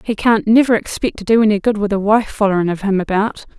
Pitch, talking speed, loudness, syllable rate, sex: 205 Hz, 250 wpm, -15 LUFS, 6.2 syllables/s, female